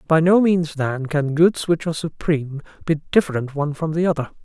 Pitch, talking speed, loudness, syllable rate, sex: 155 Hz, 205 wpm, -20 LUFS, 5.8 syllables/s, male